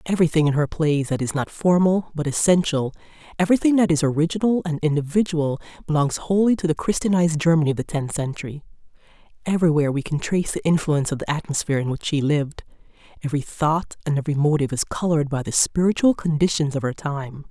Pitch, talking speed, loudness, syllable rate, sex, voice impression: 155 Hz, 180 wpm, -21 LUFS, 6.6 syllables/s, female, feminine, adult-like, slightly fluent, slightly reassuring, elegant